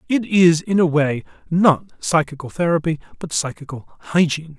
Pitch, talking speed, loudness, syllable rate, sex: 160 Hz, 145 wpm, -19 LUFS, 5.2 syllables/s, male